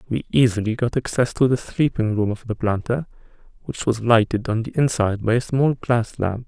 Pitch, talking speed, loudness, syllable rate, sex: 115 Hz, 205 wpm, -21 LUFS, 5.3 syllables/s, male